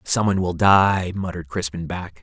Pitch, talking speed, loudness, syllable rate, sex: 90 Hz, 160 wpm, -20 LUFS, 5.2 syllables/s, male